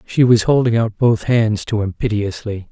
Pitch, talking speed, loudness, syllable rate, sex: 110 Hz, 200 wpm, -17 LUFS, 4.7 syllables/s, male